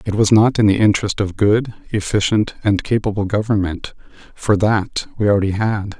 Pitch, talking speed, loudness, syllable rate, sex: 105 Hz, 170 wpm, -17 LUFS, 5.2 syllables/s, male